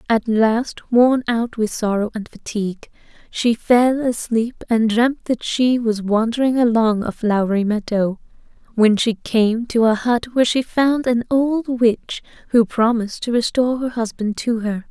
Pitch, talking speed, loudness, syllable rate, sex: 230 Hz, 165 wpm, -18 LUFS, 4.3 syllables/s, female